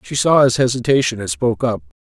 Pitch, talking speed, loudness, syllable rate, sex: 125 Hz, 205 wpm, -16 LUFS, 6.3 syllables/s, male